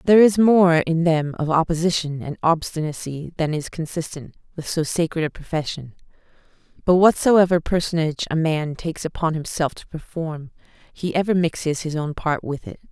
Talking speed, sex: 165 wpm, female